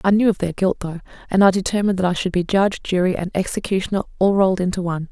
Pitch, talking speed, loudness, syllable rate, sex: 190 Hz, 245 wpm, -19 LUFS, 7.4 syllables/s, female